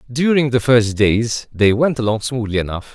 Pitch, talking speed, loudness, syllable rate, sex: 120 Hz, 185 wpm, -17 LUFS, 4.8 syllables/s, male